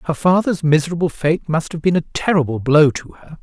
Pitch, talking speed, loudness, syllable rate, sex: 160 Hz, 210 wpm, -17 LUFS, 5.6 syllables/s, male